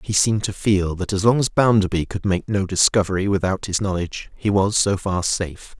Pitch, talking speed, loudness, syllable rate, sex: 100 Hz, 220 wpm, -20 LUFS, 5.5 syllables/s, male